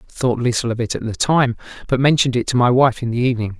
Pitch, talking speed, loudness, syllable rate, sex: 120 Hz, 265 wpm, -18 LUFS, 6.8 syllables/s, male